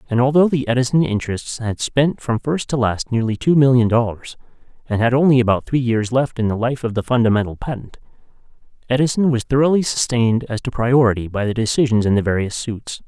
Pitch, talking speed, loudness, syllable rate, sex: 120 Hz, 195 wpm, -18 LUFS, 5.9 syllables/s, male